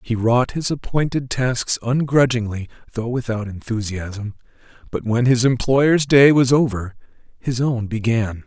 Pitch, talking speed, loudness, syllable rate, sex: 120 Hz, 135 wpm, -19 LUFS, 4.2 syllables/s, male